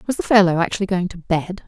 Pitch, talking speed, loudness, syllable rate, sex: 185 Hz, 250 wpm, -19 LUFS, 6.5 syllables/s, female